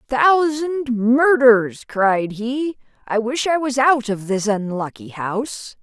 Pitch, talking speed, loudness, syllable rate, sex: 240 Hz, 135 wpm, -19 LUFS, 3.4 syllables/s, female